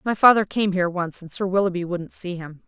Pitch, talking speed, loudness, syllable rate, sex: 185 Hz, 245 wpm, -22 LUFS, 5.8 syllables/s, female